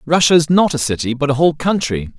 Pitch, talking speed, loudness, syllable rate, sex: 150 Hz, 245 wpm, -15 LUFS, 6.3 syllables/s, male